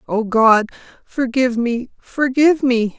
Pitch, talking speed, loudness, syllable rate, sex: 245 Hz, 80 wpm, -16 LUFS, 4.2 syllables/s, female